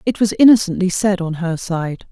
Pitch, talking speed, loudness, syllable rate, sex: 190 Hz, 200 wpm, -16 LUFS, 5.1 syllables/s, female